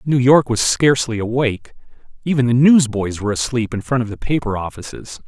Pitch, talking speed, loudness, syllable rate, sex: 120 Hz, 180 wpm, -17 LUFS, 5.9 syllables/s, male